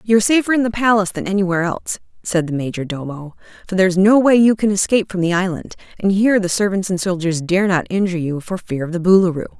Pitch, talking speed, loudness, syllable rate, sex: 190 Hz, 230 wpm, -17 LUFS, 6.9 syllables/s, female